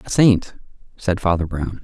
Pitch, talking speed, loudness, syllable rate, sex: 95 Hz, 165 wpm, -19 LUFS, 4.4 syllables/s, male